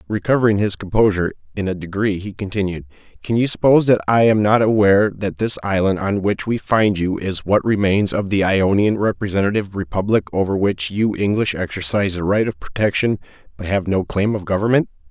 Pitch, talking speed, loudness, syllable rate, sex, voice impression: 100 Hz, 185 wpm, -18 LUFS, 5.8 syllables/s, male, very masculine, adult-like, thick, cool, slightly intellectual, calm, slightly wild